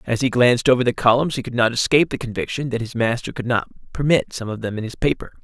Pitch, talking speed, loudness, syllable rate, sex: 125 Hz, 265 wpm, -20 LUFS, 6.8 syllables/s, male